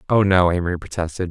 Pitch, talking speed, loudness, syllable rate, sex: 90 Hz, 185 wpm, -19 LUFS, 7.2 syllables/s, male